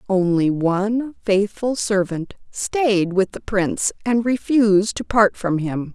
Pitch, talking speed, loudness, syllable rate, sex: 205 Hz, 140 wpm, -20 LUFS, 3.8 syllables/s, female